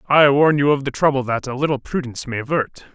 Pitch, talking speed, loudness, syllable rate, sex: 135 Hz, 245 wpm, -19 LUFS, 6.2 syllables/s, male